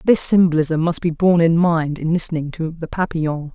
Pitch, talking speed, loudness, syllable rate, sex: 165 Hz, 205 wpm, -18 LUFS, 5.6 syllables/s, female